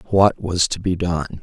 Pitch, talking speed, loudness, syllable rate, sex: 90 Hz, 210 wpm, -19 LUFS, 4.2 syllables/s, male